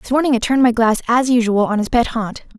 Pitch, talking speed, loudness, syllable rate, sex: 235 Hz, 280 wpm, -16 LUFS, 6.3 syllables/s, female